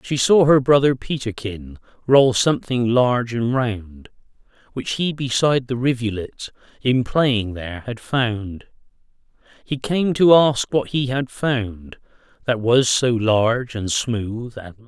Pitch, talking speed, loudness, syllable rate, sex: 120 Hz, 145 wpm, -19 LUFS, 4.0 syllables/s, male